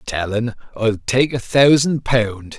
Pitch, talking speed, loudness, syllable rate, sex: 120 Hz, 115 wpm, -18 LUFS, 3.1 syllables/s, male